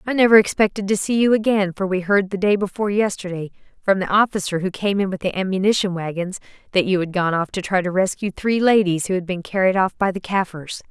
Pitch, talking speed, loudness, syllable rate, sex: 190 Hz, 235 wpm, -20 LUFS, 6.1 syllables/s, female